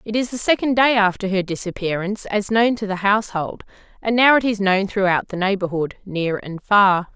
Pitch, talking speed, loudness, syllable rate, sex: 200 Hz, 200 wpm, -19 LUFS, 5.3 syllables/s, female